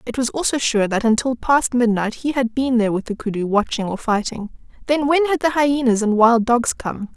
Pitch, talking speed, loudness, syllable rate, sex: 240 Hz, 225 wpm, -19 LUFS, 5.3 syllables/s, female